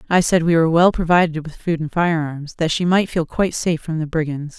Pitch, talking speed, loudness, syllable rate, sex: 165 Hz, 260 wpm, -18 LUFS, 5.9 syllables/s, female